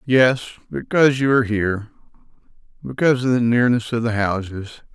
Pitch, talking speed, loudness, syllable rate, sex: 115 Hz, 145 wpm, -19 LUFS, 5.9 syllables/s, male